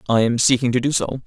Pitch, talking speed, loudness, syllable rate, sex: 125 Hz, 285 wpm, -18 LUFS, 6.4 syllables/s, male